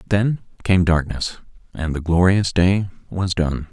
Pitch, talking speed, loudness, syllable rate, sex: 90 Hz, 145 wpm, -20 LUFS, 4.0 syllables/s, male